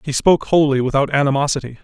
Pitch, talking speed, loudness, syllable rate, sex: 140 Hz, 165 wpm, -16 LUFS, 7.1 syllables/s, male